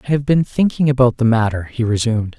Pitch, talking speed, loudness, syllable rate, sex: 125 Hz, 225 wpm, -16 LUFS, 6.2 syllables/s, male